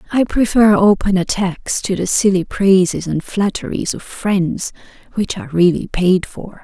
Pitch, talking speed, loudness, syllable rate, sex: 190 Hz, 155 wpm, -16 LUFS, 4.4 syllables/s, female